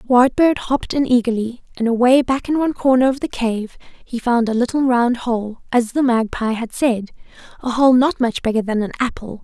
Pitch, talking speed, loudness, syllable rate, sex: 245 Hz, 205 wpm, -18 LUFS, 5.4 syllables/s, female